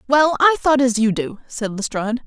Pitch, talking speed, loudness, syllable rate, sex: 250 Hz, 210 wpm, -18 LUFS, 5.2 syllables/s, female